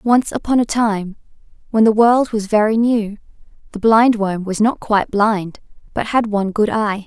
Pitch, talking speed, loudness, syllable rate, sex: 215 Hz, 180 wpm, -16 LUFS, 4.6 syllables/s, female